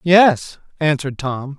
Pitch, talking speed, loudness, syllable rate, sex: 150 Hz, 115 wpm, -18 LUFS, 3.9 syllables/s, male